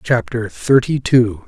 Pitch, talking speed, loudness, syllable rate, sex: 120 Hz, 120 wpm, -16 LUFS, 3.7 syllables/s, male